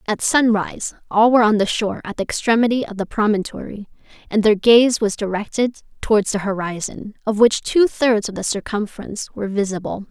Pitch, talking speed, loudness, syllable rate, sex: 215 Hz, 180 wpm, -19 LUFS, 5.8 syllables/s, female